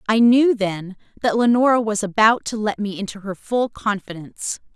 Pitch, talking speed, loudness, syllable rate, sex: 215 Hz, 175 wpm, -19 LUFS, 5.0 syllables/s, female